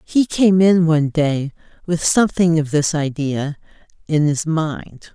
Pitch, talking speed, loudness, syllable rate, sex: 160 Hz, 150 wpm, -17 LUFS, 4.1 syllables/s, female